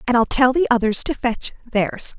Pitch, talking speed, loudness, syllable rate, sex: 240 Hz, 220 wpm, -19 LUFS, 5.0 syllables/s, female